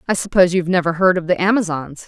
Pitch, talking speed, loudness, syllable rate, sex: 180 Hz, 260 wpm, -17 LUFS, 7.3 syllables/s, female